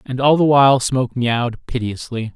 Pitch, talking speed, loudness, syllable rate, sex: 125 Hz, 180 wpm, -17 LUFS, 5.5 syllables/s, male